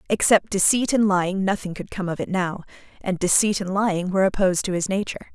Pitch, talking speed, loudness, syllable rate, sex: 190 Hz, 215 wpm, -22 LUFS, 6.4 syllables/s, female